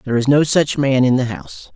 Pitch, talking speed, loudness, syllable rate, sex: 135 Hz, 275 wpm, -16 LUFS, 6.2 syllables/s, male